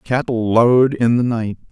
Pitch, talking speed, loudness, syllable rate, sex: 115 Hz, 175 wpm, -16 LUFS, 4.6 syllables/s, male